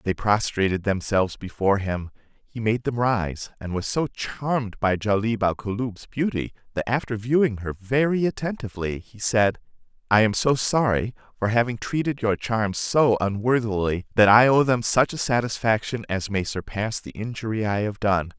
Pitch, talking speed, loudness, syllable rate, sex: 110 Hz, 170 wpm, -23 LUFS, 4.9 syllables/s, male